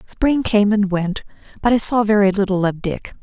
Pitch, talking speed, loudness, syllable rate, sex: 205 Hz, 205 wpm, -17 LUFS, 4.9 syllables/s, female